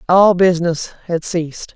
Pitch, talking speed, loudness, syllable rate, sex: 170 Hz, 135 wpm, -16 LUFS, 5.1 syllables/s, female